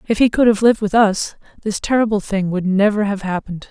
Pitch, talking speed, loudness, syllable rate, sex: 205 Hz, 225 wpm, -17 LUFS, 6.0 syllables/s, female